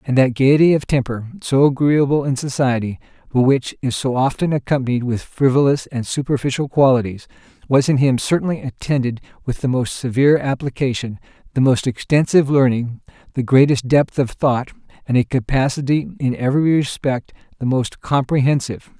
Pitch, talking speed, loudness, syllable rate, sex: 135 Hz, 150 wpm, -18 LUFS, 5.4 syllables/s, male